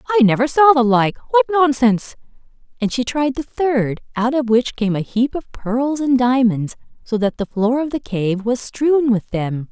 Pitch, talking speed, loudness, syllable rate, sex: 250 Hz, 200 wpm, -18 LUFS, 4.7 syllables/s, female